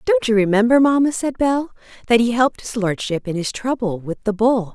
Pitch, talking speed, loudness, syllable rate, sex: 225 Hz, 215 wpm, -18 LUFS, 5.4 syllables/s, female